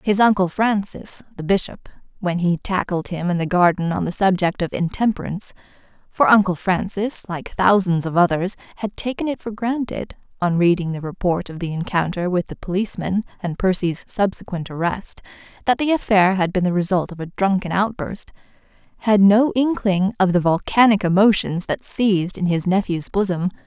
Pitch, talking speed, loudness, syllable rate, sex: 190 Hz, 165 wpm, -20 LUFS, 5.2 syllables/s, female